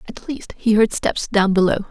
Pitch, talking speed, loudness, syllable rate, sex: 210 Hz, 220 wpm, -18 LUFS, 4.6 syllables/s, female